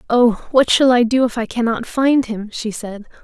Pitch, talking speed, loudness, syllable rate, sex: 235 Hz, 225 wpm, -16 LUFS, 4.6 syllables/s, female